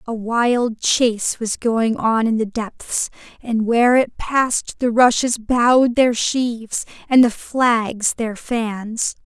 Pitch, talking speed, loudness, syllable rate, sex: 230 Hz, 150 wpm, -18 LUFS, 3.5 syllables/s, female